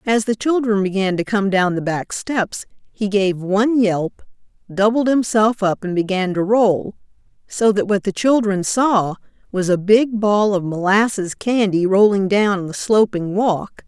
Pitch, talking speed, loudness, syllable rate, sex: 205 Hz, 170 wpm, -18 LUFS, 4.2 syllables/s, female